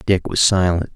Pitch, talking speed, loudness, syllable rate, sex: 90 Hz, 190 wpm, -17 LUFS, 4.8 syllables/s, male